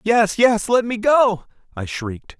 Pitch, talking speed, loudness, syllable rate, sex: 200 Hz, 175 wpm, -18 LUFS, 4.0 syllables/s, male